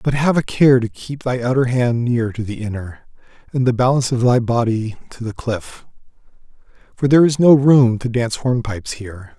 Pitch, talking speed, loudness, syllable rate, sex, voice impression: 120 Hz, 200 wpm, -17 LUFS, 5.4 syllables/s, male, very masculine, very adult-like, old, thick, slightly thin, tensed, slightly powerful, slightly bright, slightly dark, slightly hard, clear, slightly fluent, cool, very intellectual, slightly refreshing, sincere, calm, reassuring, slightly unique, elegant, slightly wild, very sweet, kind, strict, slightly modest